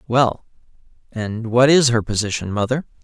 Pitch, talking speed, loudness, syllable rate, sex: 120 Hz, 120 wpm, -18 LUFS, 4.9 syllables/s, male